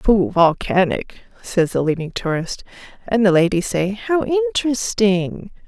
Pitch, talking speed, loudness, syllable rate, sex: 190 Hz, 125 wpm, -19 LUFS, 4.3 syllables/s, female